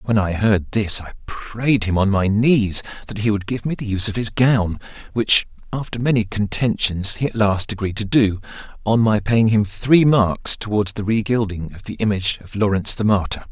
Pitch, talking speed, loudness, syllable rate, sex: 105 Hz, 205 wpm, -19 LUFS, 5.1 syllables/s, male